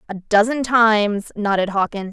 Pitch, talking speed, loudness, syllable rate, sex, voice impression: 210 Hz, 140 wpm, -18 LUFS, 4.7 syllables/s, female, very feminine, very middle-aged, very thin, very tensed, powerful, very bright, very hard, very clear, very fluent, cute, intellectual, refreshing, slightly sincere, slightly calm, friendly, reassuring, unique, slightly elegant, slightly wild, slightly sweet, lively, strict, intense, sharp